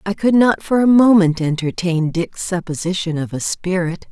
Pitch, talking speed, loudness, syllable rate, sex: 185 Hz, 175 wpm, -17 LUFS, 4.8 syllables/s, female